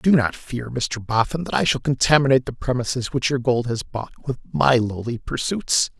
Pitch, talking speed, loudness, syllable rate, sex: 125 Hz, 200 wpm, -21 LUFS, 5.0 syllables/s, male